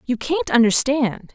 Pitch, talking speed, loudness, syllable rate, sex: 255 Hz, 135 wpm, -19 LUFS, 4.1 syllables/s, female